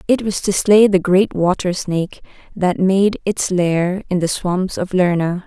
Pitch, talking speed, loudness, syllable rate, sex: 185 Hz, 185 wpm, -17 LUFS, 4.1 syllables/s, female